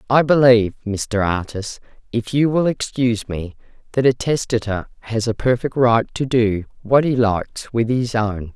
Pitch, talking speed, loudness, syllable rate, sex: 115 Hz, 170 wpm, -19 LUFS, 4.6 syllables/s, female